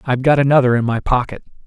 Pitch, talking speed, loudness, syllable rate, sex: 130 Hz, 215 wpm, -15 LUFS, 7.6 syllables/s, male